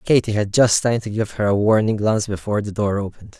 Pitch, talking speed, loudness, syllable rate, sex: 105 Hz, 250 wpm, -19 LUFS, 6.4 syllables/s, male